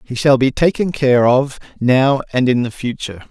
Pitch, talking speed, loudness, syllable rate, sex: 130 Hz, 200 wpm, -15 LUFS, 4.8 syllables/s, male